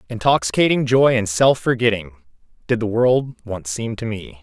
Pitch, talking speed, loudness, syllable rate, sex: 110 Hz, 165 wpm, -19 LUFS, 4.7 syllables/s, male